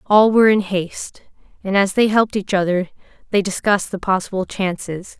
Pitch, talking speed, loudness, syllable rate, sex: 195 Hz, 175 wpm, -18 LUFS, 5.7 syllables/s, female